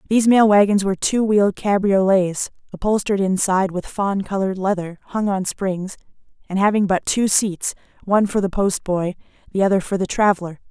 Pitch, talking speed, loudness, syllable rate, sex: 195 Hz, 170 wpm, -19 LUFS, 5.6 syllables/s, female